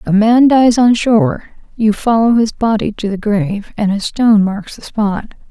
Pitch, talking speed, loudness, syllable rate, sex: 220 Hz, 185 wpm, -13 LUFS, 4.8 syllables/s, female